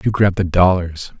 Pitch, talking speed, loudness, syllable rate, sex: 90 Hz, 200 wpm, -16 LUFS, 4.7 syllables/s, male